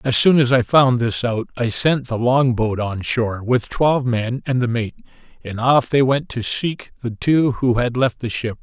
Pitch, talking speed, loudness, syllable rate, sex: 125 Hz, 230 wpm, -18 LUFS, 4.5 syllables/s, male